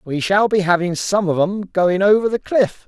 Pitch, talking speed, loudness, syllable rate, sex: 190 Hz, 230 wpm, -17 LUFS, 4.7 syllables/s, male